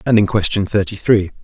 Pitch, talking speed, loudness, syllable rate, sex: 100 Hz, 210 wpm, -16 LUFS, 5.7 syllables/s, male